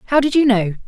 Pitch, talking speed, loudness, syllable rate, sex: 245 Hz, 275 wpm, -16 LUFS, 7.1 syllables/s, female